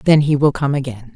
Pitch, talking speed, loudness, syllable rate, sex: 140 Hz, 260 wpm, -16 LUFS, 5.9 syllables/s, female